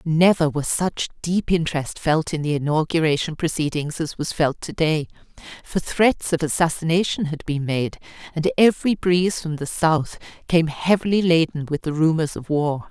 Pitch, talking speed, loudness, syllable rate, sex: 160 Hz, 165 wpm, -21 LUFS, 4.9 syllables/s, female